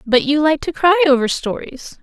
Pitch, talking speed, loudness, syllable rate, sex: 290 Hz, 210 wpm, -15 LUFS, 5.3 syllables/s, female